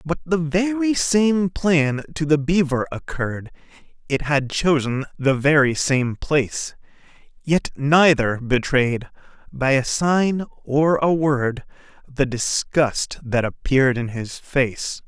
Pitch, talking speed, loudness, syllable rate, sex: 145 Hz, 125 wpm, -20 LUFS, 3.6 syllables/s, male